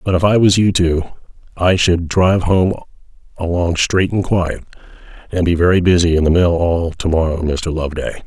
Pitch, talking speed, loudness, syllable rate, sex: 85 Hz, 190 wpm, -15 LUFS, 5.3 syllables/s, male